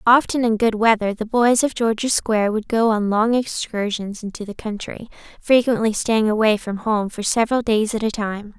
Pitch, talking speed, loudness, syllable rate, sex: 220 Hz, 195 wpm, -19 LUFS, 5.1 syllables/s, female